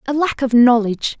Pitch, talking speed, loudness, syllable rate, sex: 250 Hz, 200 wpm, -15 LUFS, 5.8 syllables/s, female